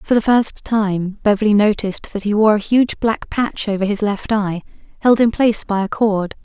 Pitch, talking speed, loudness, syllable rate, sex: 210 Hz, 215 wpm, -17 LUFS, 4.9 syllables/s, female